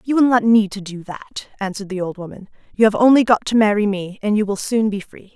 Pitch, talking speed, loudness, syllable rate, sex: 210 Hz, 270 wpm, -17 LUFS, 6.0 syllables/s, female